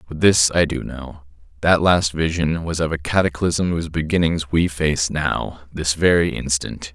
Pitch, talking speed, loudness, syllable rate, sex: 80 Hz, 155 wpm, -19 LUFS, 4.5 syllables/s, male